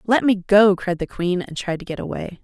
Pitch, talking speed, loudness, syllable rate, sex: 190 Hz, 270 wpm, -20 LUFS, 5.2 syllables/s, female